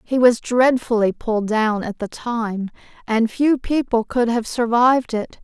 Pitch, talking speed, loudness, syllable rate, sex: 230 Hz, 165 wpm, -19 LUFS, 4.2 syllables/s, female